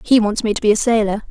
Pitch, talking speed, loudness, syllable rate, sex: 215 Hz, 320 wpm, -16 LUFS, 6.7 syllables/s, female